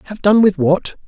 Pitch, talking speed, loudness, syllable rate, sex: 190 Hz, 220 wpm, -14 LUFS, 5.0 syllables/s, male